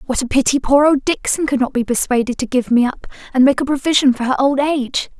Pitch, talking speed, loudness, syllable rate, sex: 265 Hz, 255 wpm, -16 LUFS, 6.2 syllables/s, female